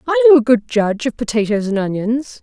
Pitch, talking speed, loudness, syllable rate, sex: 240 Hz, 225 wpm, -16 LUFS, 6.1 syllables/s, female